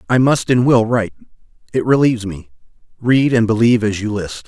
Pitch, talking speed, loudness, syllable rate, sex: 115 Hz, 175 wpm, -15 LUFS, 5.9 syllables/s, male